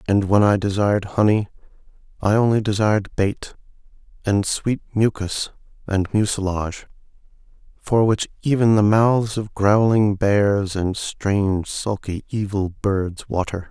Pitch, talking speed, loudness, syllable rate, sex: 100 Hz, 125 wpm, -20 LUFS, 4.2 syllables/s, male